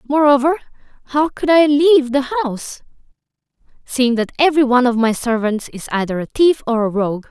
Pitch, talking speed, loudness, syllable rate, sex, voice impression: 260 Hz, 170 wpm, -16 LUFS, 5.7 syllables/s, female, feminine, young, tensed, slightly bright, halting, intellectual, friendly, unique